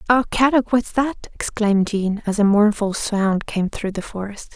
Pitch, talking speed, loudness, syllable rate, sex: 215 Hz, 185 wpm, -20 LUFS, 4.6 syllables/s, female